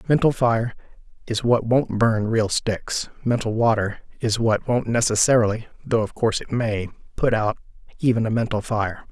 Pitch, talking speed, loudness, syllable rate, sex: 115 Hz, 165 wpm, -22 LUFS, 4.4 syllables/s, male